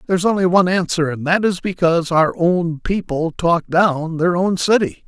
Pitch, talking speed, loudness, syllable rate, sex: 170 Hz, 200 wpm, -17 LUFS, 5.1 syllables/s, male